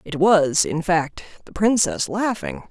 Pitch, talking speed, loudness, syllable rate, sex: 185 Hz, 155 wpm, -20 LUFS, 3.8 syllables/s, female